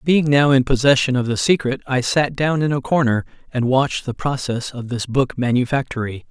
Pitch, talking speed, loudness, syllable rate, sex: 130 Hz, 200 wpm, -19 LUFS, 5.3 syllables/s, male